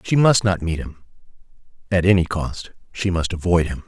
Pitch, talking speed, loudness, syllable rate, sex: 90 Hz, 170 wpm, -20 LUFS, 5.2 syllables/s, male